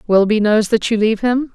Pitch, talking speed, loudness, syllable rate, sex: 220 Hz, 235 wpm, -15 LUFS, 6.5 syllables/s, female